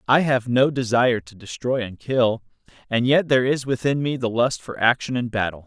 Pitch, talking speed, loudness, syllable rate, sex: 125 Hz, 210 wpm, -21 LUFS, 5.4 syllables/s, male